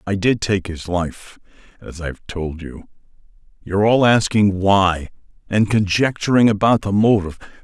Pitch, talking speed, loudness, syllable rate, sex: 100 Hz, 150 wpm, -18 LUFS, 5.0 syllables/s, male